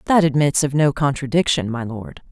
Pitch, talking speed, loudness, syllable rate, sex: 140 Hz, 180 wpm, -19 LUFS, 5.3 syllables/s, female